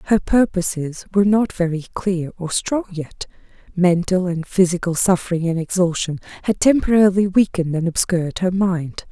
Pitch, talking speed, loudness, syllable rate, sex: 180 Hz, 140 wpm, -19 LUFS, 5.2 syllables/s, female